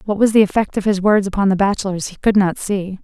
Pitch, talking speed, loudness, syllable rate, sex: 200 Hz, 275 wpm, -17 LUFS, 6.3 syllables/s, female